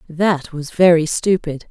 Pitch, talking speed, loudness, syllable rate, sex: 165 Hz, 140 wpm, -16 LUFS, 3.9 syllables/s, female